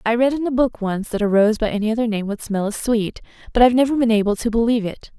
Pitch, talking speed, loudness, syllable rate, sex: 225 Hz, 290 wpm, -19 LUFS, 6.8 syllables/s, female